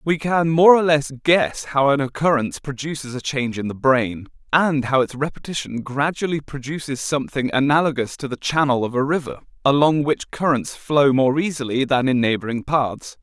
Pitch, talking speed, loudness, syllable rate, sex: 140 Hz, 175 wpm, -20 LUFS, 5.2 syllables/s, male